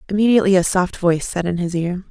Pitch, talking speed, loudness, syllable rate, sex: 185 Hz, 230 wpm, -18 LUFS, 7.0 syllables/s, female